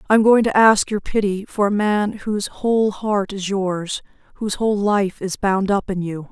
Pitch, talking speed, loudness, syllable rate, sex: 200 Hz, 220 wpm, -19 LUFS, 4.9 syllables/s, female